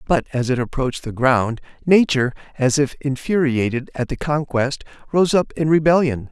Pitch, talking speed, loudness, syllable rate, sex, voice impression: 140 Hz, 160 wpm, -19 LUFS, 5.2 syllables/s, male, masculine, very adult-like, slightly thick, slightly fluent, slightly refreshing, sincere, slightly unique